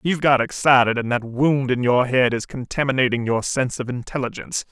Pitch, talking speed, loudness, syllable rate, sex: 130 Hz, 190 wpm, -20 LUFS, 5.9 syllables/s, male